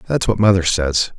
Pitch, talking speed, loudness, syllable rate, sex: 90 Hz, 205 wpm, -16 LUFS, 5.1 syllables/s, male